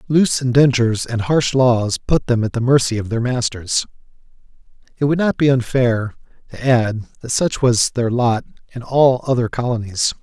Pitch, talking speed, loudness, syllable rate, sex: 125 Hz, 170 wpm, -17 LUFS, 4.7 syllables/s, male